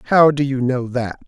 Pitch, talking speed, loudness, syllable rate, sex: 130 Hz, 235 wpm, -18 LUFS, 4.9 syllables/s, male